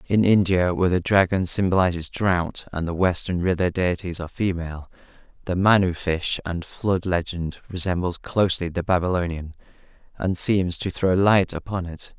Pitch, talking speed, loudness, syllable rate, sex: 90 Hz, 155 wpm, -22 LUFS, 5.0 syllables/s, male